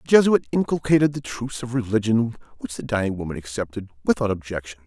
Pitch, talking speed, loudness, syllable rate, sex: 115 Hz, 175 wpm, -23 LUFS, 6.3 syllables/s, male